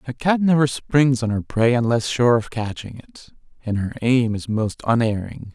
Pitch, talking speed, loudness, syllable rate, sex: 120 Hz, 195 wpm, -20 LUFS, 4.6 syllables/s, male